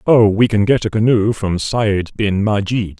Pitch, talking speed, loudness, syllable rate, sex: 105 Hz, 200 wpm, -16 LUFS, 4.3 syllables/s, male